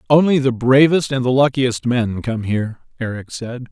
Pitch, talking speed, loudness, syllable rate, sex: 125 Hz, 180 wpm, -17 LUFS, 4.9 syllables/s, male